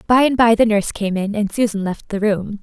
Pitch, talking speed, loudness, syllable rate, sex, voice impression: 215 Hz, 275 wpm, -17 LUFS, 5.7 syllables/s, female, feminine, slightly adult-like, soft, intellectual, calm, elegant, slightly sweet, slightly kind